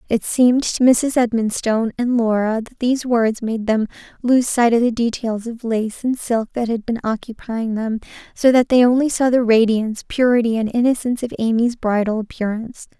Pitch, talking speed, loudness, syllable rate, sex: 235 Hz, 185 wpm, -18 LUFS, 5.3 syllables/s, female